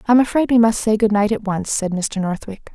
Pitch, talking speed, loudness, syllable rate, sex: 215 Hz, 260 wpm, -18 LUFS, 5.5 syllables/s, female